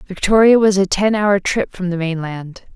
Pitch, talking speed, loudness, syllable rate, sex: 190 Hz, 195 wpm, -15 LUFS, 4.7 syllables/s, female